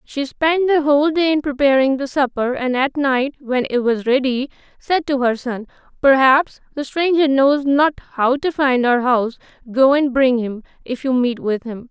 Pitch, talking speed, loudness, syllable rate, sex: 265 Hz, 195 wpm, -17 LUFS, 4.7 syllables/s, female